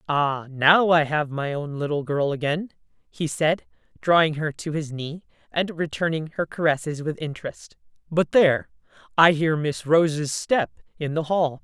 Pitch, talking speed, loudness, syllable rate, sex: 155 Hz, 165 wpm, -23 LUFS, 4.6 syllables/s, female